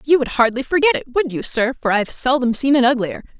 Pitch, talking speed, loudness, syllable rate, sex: 260 Hz, 245 wpm, -18 LUFS, 6.4 syllables/s, female